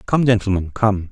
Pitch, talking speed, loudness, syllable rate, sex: 105 Hz, 160 wpm, -18 LUFS, 5.3 syllables/s, male